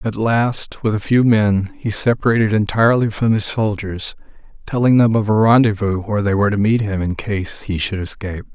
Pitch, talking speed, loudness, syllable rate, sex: 105 Hz, 195 wpm, -17 LUFS, 5.4 syllables/s, male